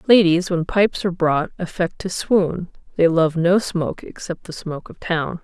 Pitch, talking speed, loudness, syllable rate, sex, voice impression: 175 Hz, 190 wpm, -20 LUFS, 4.9 syllables/s, female, feminine, adult-like, fluent, slightly cool, slightly intellectual, calm